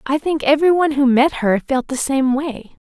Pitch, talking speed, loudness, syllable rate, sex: 275 Hz, 205 wpm, -17 LUFS, 4.9 syllables/s, female